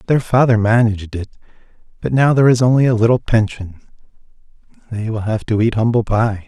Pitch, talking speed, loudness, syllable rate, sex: 110 Hz, 175 wpm, -15 LUFS, 6.0 syllables/s, male